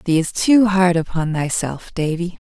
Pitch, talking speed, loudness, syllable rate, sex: 175 Hz, 170 wpm, -18 LUFS, 4.2 syllables/s, female